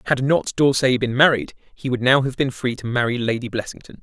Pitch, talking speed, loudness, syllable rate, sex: 125 Hz, 225 wpm, -20 LUFS, 5.8 syllables/s, male